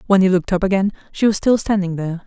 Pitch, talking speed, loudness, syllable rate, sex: 190 Hz, 265 wpm, -18 LUFS, 7.3 syllables/s, female